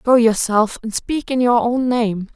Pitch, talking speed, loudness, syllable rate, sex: 235 Hz, 205 wpm, -17 LUFS, 4.1 syllables/s, female